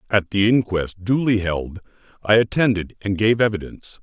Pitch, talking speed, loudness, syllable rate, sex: 100 Hz, 150 wpm, -20 LUFS, 5.1 syllables/s, male